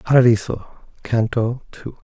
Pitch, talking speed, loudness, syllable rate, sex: 115 Hz, 85 wpm, -19 LUFS, 4.4 syllables/s, male